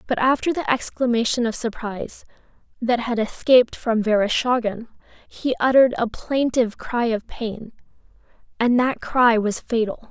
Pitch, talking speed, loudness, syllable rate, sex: 235 Hz, 135 wpm, -21 LUFS, 4.8 syllables/s, female